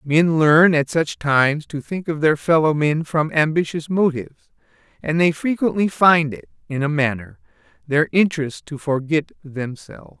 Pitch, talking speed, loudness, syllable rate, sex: 155 Hz, 160 wpm, -19 LUFS, 4.6 syllables/s, male